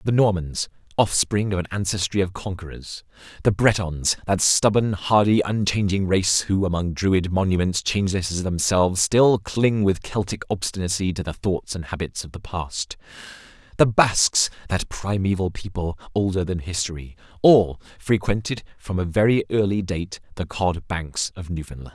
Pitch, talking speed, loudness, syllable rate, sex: 95 Hz, 140 wpm, -22 LUFS, 4.8 syllables/s, male